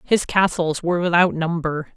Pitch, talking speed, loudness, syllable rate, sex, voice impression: 170 Hz, 155 wpm, -20 LUFS, 5.0 syllables/s, female, gender-neutral, adult-like, tensed, slightly bright, clear, fluent, intellectual, calm, friendly, unique, lively, kind